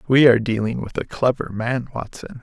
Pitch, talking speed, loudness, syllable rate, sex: 125 Hz, 200 wpm, -20 LUFS, 5.4 syllables/s, male